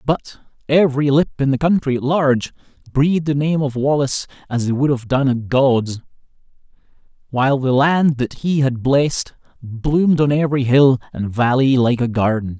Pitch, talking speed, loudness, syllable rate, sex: 135 Hz, 170 wpm, -17 LUFS, 5.1 syllables/s, male